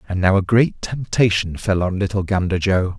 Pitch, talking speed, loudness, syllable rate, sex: 95 Hz, 200 wpm, -19 LUFS, 5.0 syllables/s, male